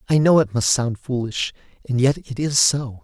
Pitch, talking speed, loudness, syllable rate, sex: 130 Hz, 215 wpm, -20 LUFS, 4.8 syllables/s, male